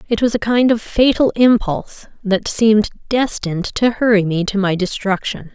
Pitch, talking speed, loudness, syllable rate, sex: 215 Hz, 175 wpm, -16 LUFS, 5.0 syllables/s, female